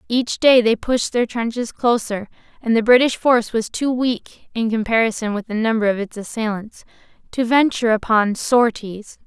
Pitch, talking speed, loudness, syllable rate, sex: 230 Hz, 170 wpm, -18 LUFS, 4.9 syllables/s, female